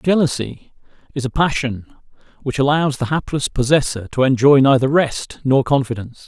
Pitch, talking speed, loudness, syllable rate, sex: 135 Hz, 145 wpm, -17 LUFS, 5.1 syllables/s, male